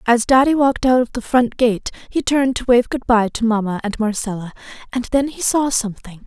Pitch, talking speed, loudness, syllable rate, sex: 240 Hz, 220 wpm, -18 LUFS, 5.7 syllables/s, female